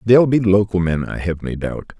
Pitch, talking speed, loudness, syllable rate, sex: 100 Hz, 240 wpm, -18 LUFS, 4.8 syllables/s, male